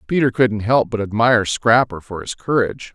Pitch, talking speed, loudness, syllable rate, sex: 115 Hz, 185 wpm, -18 LUFS, 5.4 syllables/s, male